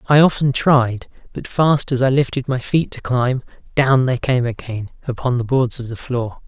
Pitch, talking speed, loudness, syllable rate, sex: 125 Hz, 205 wpm, -18 LUFS, 4.7 syllables/s, male